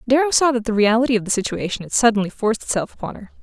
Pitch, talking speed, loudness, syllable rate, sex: 230 Hz, 245 wpm, -19 LUFS, 7.5 syllables/s, female